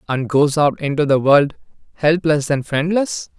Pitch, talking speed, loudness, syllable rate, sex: 150 Hz, 160 wpm, -17 LUFS, 4.5 syllables/s, male